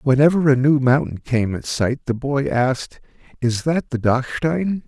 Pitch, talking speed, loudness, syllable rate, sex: 135 Hz, 170 wpm, -19 LUFS, 4.4 syllables/s, male